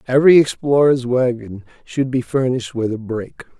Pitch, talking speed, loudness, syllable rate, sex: 125 Hz, 150 wpm, -17 LUFS, 5.1 syllables/s, male